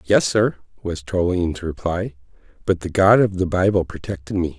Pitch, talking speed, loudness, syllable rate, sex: 90 Hz, 170 wpm, -20 LUFS, 5.1 syllables/s, male